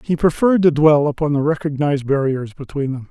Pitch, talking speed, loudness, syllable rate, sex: 145 Hz, 195 wpm, -17 LUFS, 6.0 syllables/s, male